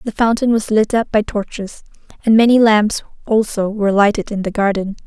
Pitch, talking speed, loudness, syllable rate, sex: 210 Hz, 190 wpm, -15 LUFS, 5.5 syllables/s, female